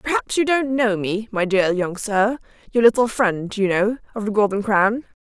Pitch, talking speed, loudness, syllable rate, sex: 215 Hz, 195 wpm, -20 LUFS, 4.7 syllables/s, female